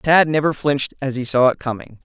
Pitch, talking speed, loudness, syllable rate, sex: 135 Hz, 235 wpm, -18 LUFS, 5.7 syllables/s, male